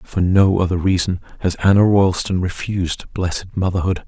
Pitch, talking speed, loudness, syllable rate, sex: 90 Hz, 145 wpm, -18 LUFS, 5.1 syllables/s, male